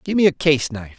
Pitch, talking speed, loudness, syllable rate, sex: 145 Hz, 245 wpm, -18 LUFS, 6.7 syllables/s, male